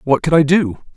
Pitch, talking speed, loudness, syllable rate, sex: 150 Hz, 250 wpm, -14 LUFS, 5.2 syllables/s, male